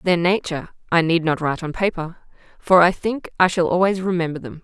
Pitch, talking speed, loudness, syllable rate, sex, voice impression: 170 Hz, 205 wpm, -19 LUFS, 5.8 syllables/s, female, gender-neutral, slightly adult-like, tensed, clear, intellectual, calm